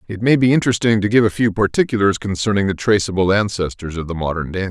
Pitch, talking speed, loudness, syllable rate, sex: 100 Hz, 215 wpm, -17 LUFS, 6.7 syllables/s, male